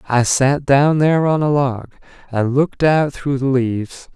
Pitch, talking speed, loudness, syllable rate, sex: 135 Hz, 190 wpm, -16 LUFS, 4.4 syllables/s, male